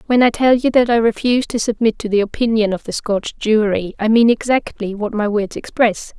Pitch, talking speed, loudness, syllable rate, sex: 220 Hz, 225 wpm, -17 LUFS, 5.4 syllables/s, female